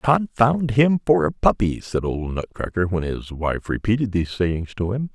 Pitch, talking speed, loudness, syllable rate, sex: 105 Hz, 185 wpm, -22 LUFS, 4.6 syllables/s, male